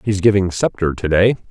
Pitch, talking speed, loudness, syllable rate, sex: 95 Hz, 160 wpm, -17 LUFS, 5.7 syllables/s, male